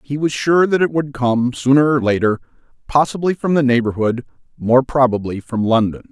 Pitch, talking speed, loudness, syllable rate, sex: 130 Hz, 175 wpm, -17 LUFS, 5.2 syllables/s, male